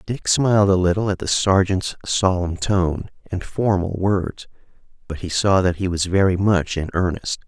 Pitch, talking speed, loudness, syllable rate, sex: 95 Hz, 175 wpm, -20 LUFS, 4.6 syllables/s, male